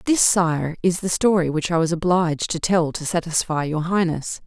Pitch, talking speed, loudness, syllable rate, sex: 170 Hz, 200 wpm, -21 LUFS, 5.0 syllables/s, female